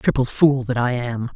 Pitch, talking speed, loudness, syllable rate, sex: 125 Hz, 220 wpm, -20 LUFS, 4.7 syllables/s, female